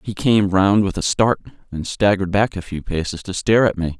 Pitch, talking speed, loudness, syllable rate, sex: 95 Hz, 240 wpm, -19 LUFS, 5.6 syllables/s, male